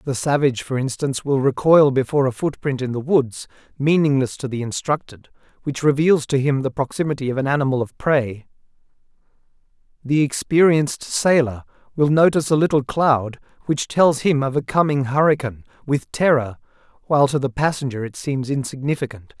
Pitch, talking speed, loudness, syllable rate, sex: 140 Hz, 160 wpm, -19 LUFS, 5.7 syllables/s, male